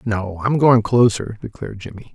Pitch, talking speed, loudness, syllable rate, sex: 110 Hz, 170 wpm, -17 LUFS, 5.0 syllables/s, male